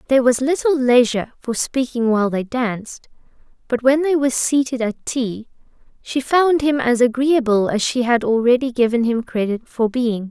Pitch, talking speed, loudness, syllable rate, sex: 245 Hz, 175 wpm, -18 LUFS, 5.1 syllables/s, female